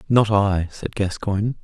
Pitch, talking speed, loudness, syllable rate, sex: 105 Hz, 145 wpm, -21 LUFS, 4.3 syllables/s, male